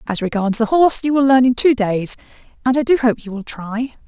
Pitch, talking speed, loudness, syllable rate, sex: 240 Hz, 250 wpm, -17 LUFS, 5.7 syllables/s, female